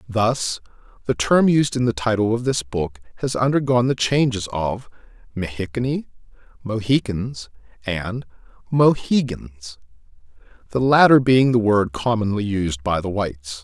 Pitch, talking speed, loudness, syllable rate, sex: 115 Hz, 130 wpm, -20 LUFS, 4.5 syllables/s, male